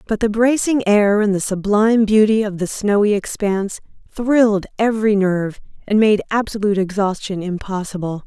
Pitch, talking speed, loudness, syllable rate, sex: 205 Hz, 145 wpm, -17 LUFS, 5.3 syllables/s, female